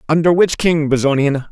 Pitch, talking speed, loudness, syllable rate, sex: 155 Hz, 160 wpm, -15 LUFS, 5.3 syllables/s, male